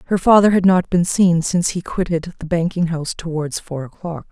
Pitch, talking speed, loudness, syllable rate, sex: 170 Hz, 210 wpm, -18 LUFS, 5.5 syllables/s, female